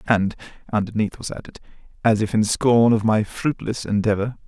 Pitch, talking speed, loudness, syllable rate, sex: 110 Hz, 160 wpm, -21 LUFS, 5.1 syllables/s, male